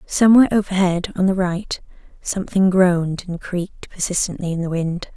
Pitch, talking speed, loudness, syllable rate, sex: 185 Hz, 150 wpm, -19 LUFS, 5.5 syllables/s, female